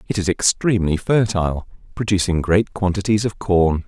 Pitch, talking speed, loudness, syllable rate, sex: 95 Hz, 140 wpm, -19 LUFS, 5.2 syllables/s, male